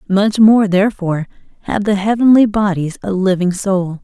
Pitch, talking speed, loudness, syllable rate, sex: 195 Hz, 150 wpm, -14 LUFS, 5.0 syllables/s, female